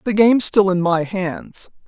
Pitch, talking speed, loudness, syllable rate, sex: 195 Hz, 190 wpm, -17 LUFS, 4.3 syllables/s, female